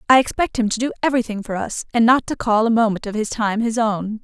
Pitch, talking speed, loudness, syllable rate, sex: 225 Hz, 270 wpm, -19 LUFS, 6.2 syllables/s, female